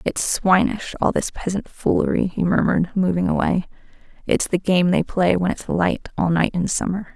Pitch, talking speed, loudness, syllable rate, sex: 185 Hz, 185 wpm, -20 LUFS, 4.9 syllables/s, female